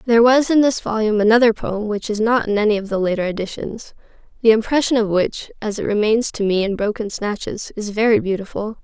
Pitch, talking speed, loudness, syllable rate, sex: 220 Hz, 210 wpm, -18 LUFS, 6.0 syllables/s, female